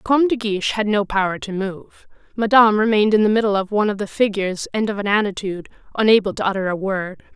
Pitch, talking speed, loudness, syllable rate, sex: 205 Hz, 230 wpm, -19 LUFS, 6.9 syllables/s, female